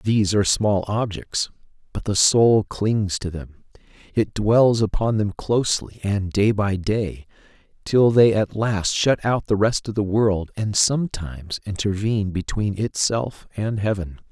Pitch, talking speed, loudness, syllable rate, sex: 105 Hz, 155 wpm, -21 LUFS, 4.2 syllables/s, male